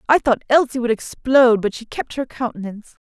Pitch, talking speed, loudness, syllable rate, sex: 240 Hz, 195 wpm, -18 LUFS, 5.8 syllables/s, female